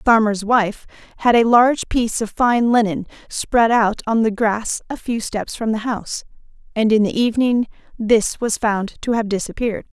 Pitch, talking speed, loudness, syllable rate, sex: 225 Hz, 185 wpm, -18 LUFS, 5.1 syllables/s, female